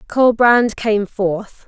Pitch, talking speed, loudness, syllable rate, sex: 220 Hz, 110 wpm, -15 LUFS, 2.7 syllables/s, female